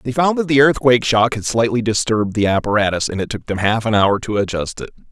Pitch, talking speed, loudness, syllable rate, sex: 115 Hz, 245 wpm, -17 LUFS, 6.3 syllables/s, male